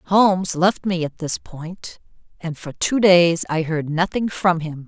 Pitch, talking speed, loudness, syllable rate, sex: 175 Hz, 185 wpm, -19 LUFS, 3.9 syllables/s, female